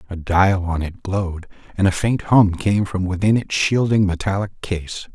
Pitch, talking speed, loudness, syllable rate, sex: 95 Hz, 185 wpm, -19 LUFS, 4.5 syllables/s, male